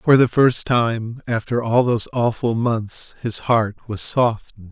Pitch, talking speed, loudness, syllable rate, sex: 115 Hz, 165 wpm, -20 LUFS, 4.0 syllables/s, male